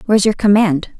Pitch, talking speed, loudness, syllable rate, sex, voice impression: 200 Hz, 180 wpm, -14 LUFS, 6.4 syllables/s, female, very feminine, adult-like, fluent, sincere, friendly, slightly kind